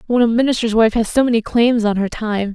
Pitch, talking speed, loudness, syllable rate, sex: 225 Hz, 260 wpm, -16 LUFS, 5.9 syllables/s, female